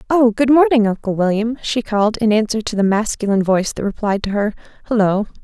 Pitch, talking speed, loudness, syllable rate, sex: 220 Hz, 200 wpm, -17 LUFS, 6.1 syllables/s, female